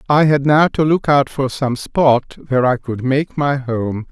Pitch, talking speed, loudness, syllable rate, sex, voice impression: 135 Hz, 220 wpm, -16 LUFS, 4.2 syllables/s, male, masculine, middle-aged, tensed, slightly powerful, clear, slightly halting, intellectual, calm, friendly, wild, lively, slightly strict, slightly intense, sharp